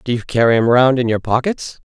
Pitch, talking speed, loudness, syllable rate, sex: 125 Hz, 255 wpm, -15 LUFS, 5.7 syllables/s, male